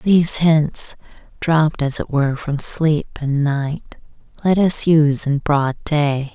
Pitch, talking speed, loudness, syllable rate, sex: 150 Hz, 150 wpm, -18 LUFS, 3.7 syllables/s, female